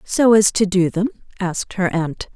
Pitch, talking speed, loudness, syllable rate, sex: 190 Hz, 205 wpm, -18 LUFS, 4.7 syllables/s, female